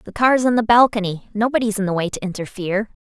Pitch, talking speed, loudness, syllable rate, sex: 210 Hz, 220 wpm, -19 LUFS, 6.3 syllables/s, female